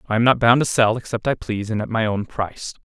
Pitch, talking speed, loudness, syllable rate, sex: 115 Hz, 295 wpm, -20 LUFS, 6.4 syllables/s, male